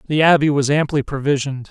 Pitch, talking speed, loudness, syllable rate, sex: 140 Hz, 175 wpm, -17 LUFS, 6.5 syllables/s, male